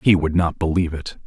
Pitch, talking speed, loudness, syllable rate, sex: 85 Hz, 240 wpm, -20 LUFS, 5.9 syllables/s, male